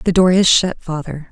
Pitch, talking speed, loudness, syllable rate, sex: 170 Hz, 230 wpm, -15 LUFS, 4.7 syllables/s, female